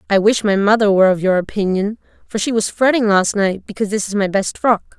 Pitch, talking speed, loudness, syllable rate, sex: 205 Hz, 240 wpm, -16 LUFS, 6.0 syllables/s, female